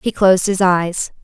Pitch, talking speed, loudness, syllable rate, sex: 185 Hz, 195 wpm, -15 LUFS, 4.5 syllables/s, female